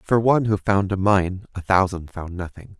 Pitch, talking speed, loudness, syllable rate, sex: 95 Hz, 235 wpm, -21 LUFS, 5.6 syllables/s, male